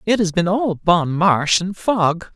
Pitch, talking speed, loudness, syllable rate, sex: 180 Hz, 205 wpm, -18 LUFS, 4.0 syllables/s, male